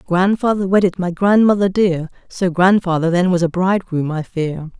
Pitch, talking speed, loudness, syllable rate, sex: 180 Hz, 165 wpm, -16 LUFS, 5.0 syllables/s, female